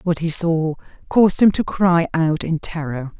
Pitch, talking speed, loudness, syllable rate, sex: 165 Hz, 190 wpm, -18 LUFS, 4.5 syllables/s, female